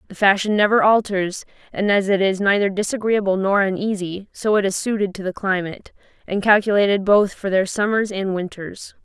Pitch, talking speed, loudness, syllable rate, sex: 200 Hz, 180 wpm, -19 LUFS, 5.4 syllables/s, female